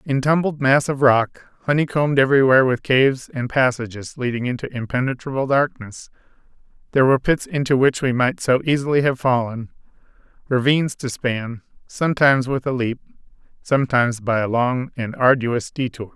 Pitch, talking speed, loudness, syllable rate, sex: 130 Hz, 150 wpm, -19 LUFS, 5.5 syllables/s, male